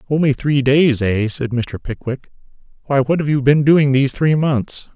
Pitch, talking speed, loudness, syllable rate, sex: 135 Hz, 195 wpm, -16 LUFS, 4.6 syllables/s, male